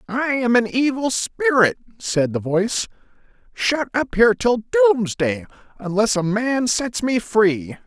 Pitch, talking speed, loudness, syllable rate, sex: 210 Hz, 145 wpm, -19 LUFS, 4.1 syllables/s, male